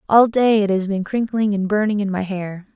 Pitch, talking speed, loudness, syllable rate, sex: 205 Hz, 240 wpm, -19 LUFS, 5.2 syllables/s, female